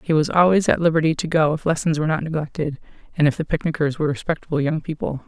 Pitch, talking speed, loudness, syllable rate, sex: 155 Hz, 225 wpm, -21 LUFS, 7.1 syllables/s, female